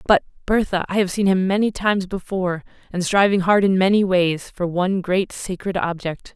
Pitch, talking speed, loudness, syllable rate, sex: 185 Hz, 190 wpm, -20 LUFS, 5.3 syllables/s, female